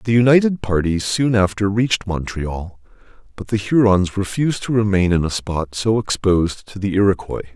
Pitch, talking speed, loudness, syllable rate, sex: 100 Hz, 165 wpm, -18 LUFS, 5.1 syllables/s, male